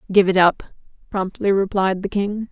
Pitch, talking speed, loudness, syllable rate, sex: 195 Hz, 165 wpm, -19 LUFS, 4.8 syllables/s, female